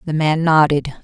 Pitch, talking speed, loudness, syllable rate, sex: 155 Hz, 175 wpm, -15 LUFS, 4.5 syllables/s, female